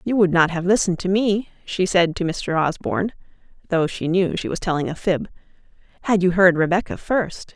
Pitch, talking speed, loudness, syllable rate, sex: 180 Hz, 200 wpm, -20 LUFS, 4.4 syllables/s, female